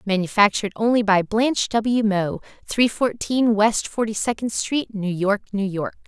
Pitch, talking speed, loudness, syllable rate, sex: 215 Hz, 160 wpm, -21 LUFS, 4.6 syllables/s, female